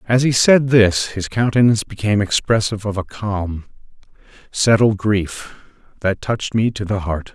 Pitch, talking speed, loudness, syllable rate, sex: 105 Hz, 155 wpm, -17 LUFS, 5.0 syllables/s, male